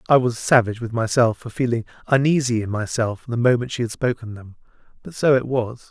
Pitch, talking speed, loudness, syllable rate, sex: 120 Hz, 195 wpm, -21 LUFS, 5.8 syllables/s, male